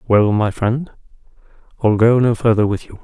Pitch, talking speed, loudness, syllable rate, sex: 110 Hz, 180 wpm, -16 LUFS, 5.0 syllables/s, male